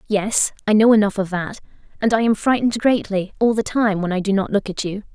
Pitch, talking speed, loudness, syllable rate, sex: 205 Hz, 245 wpm, -19 LUFS, 5.9 syllables/s, female